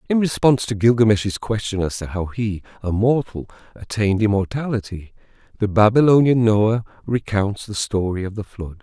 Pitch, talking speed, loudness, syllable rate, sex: 105 Hz, 150 wpm, -19 LUFS, 5.3 syllables/s, male